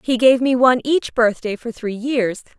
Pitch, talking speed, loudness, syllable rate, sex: 240 Hz, 210 wpm, -18 LUFS, 4.7 syllables/s, female